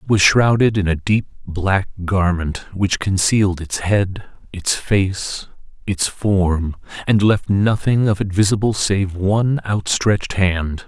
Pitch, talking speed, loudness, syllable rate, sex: 100 Hz, 145 wpm, -18 LUFS, 3.8 syllables/s, male